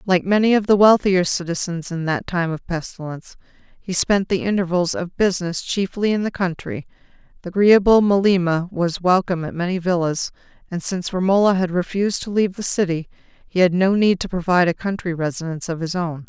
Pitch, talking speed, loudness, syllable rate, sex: 180 Hz, 185 wpm, -19 LUFS, 5.9 syllables/s, female